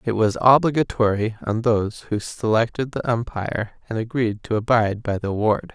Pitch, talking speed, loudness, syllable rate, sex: 115 Hz, 165 wpm, -21 LUFS, 5.5 syllables/s, male